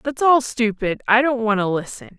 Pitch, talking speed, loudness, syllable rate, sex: 230 Hz, 220 wpm, -19 LUFS, 4.9 syllables/s, female